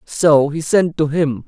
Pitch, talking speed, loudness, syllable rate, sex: 155 Hz, 205 wpm, -16 LUFS, 3.7 syllables/s, male